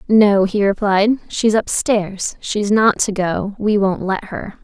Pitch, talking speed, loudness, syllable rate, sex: 205 Hz, 170 wpm, -17 LUFS, 3.6 syllables/s, female